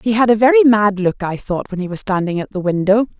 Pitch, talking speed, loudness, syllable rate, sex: 210 Hz, 280 wpm, -16 LUFS, 6.0 syllables/s, female